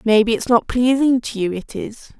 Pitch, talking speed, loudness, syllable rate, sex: 230 Hz, 220 wpm, -18 LUFS, 4.9 syllables/s, female